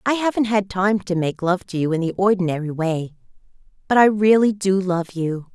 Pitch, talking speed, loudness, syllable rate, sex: 190 Hz, 205 wpm, -20 LUFS, 5.1 syllables/s, female